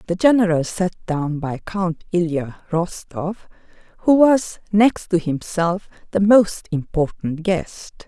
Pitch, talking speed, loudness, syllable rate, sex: 180 Hz, 125 wpm, -20 LUFS, 3.8 syllables/s, female